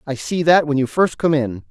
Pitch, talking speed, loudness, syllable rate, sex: 145 Hz, 280 wpm, -17 LUFS, 5.2 syllables/s, male